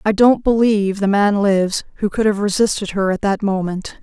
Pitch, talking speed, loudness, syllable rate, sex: 205 Hz, 210 wpm, -17 LUFS, 5.3 syllables/s, female